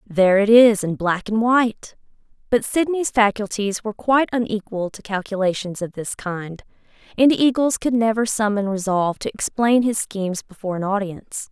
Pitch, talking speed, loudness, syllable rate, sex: 215 Hz, 160 wpm, -20 LUFS, 5.3 syllables/s, female